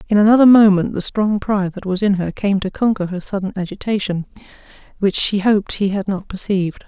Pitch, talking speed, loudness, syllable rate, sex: 200 Hz, 200 wpm, -17 LUFS, 5.9 syllables/s, female